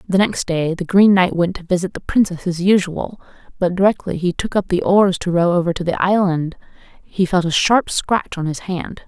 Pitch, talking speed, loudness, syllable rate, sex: 180 Hz, 225 wpm, -17 LUFS, 5.1 syllables/s, female